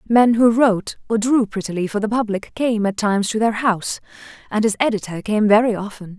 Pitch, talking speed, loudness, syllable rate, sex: 215 Hz, 205 wpm, -19 LUFS, 5.8 syllables/s, female